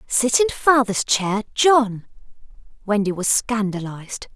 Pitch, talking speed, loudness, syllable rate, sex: 220 Hz, 110 wpm, -19 LUFS, 3.9 syllables/s, female